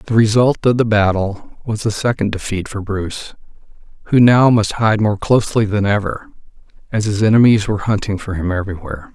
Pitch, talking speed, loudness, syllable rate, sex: 105 Hz, 175 wpm, -16 LUFS, 5.7 syllables/s, male